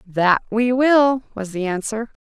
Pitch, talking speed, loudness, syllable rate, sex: 225 Hz, 160 wpm, -19 LUFS, 3.8 syllables/s, female